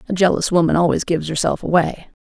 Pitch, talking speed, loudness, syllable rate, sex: 170 Hz, 190 wpm, -18 LUFS, 6.6 syllables/s, female